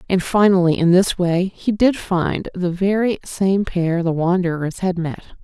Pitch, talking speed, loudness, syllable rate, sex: 185 Hz, 175 wpm, -18 LUFS, 4.2 syllables/s, female